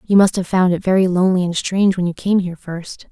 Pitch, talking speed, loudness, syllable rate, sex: 185 Hz, 270 wpm, -17 LUFS, 6.4 syllables/s, female